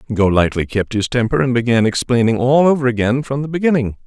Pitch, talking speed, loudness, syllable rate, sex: 125 Hz, 190 wpm, -16 LUFS, 6.2 syllables/s, male